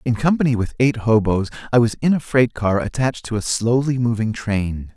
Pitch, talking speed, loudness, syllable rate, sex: 115 Hz, 205 wpm, -19 LUFS, 5.3 syllables/s, male